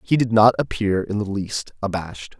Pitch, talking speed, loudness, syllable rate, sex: 105 Hz, 200 wpm, -21 LUFS, 5.1 syllables/s, male